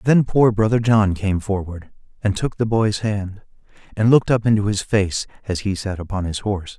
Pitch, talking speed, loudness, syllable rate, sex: 105 Hz, 205 wpm, -20 LUFS, 5.2 syllables/s, male